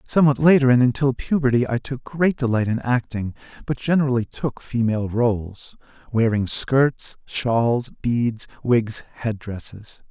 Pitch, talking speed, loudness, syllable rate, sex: 120 Hz, 135 wpm, -21 LUFS, 4.5 syllables/s, male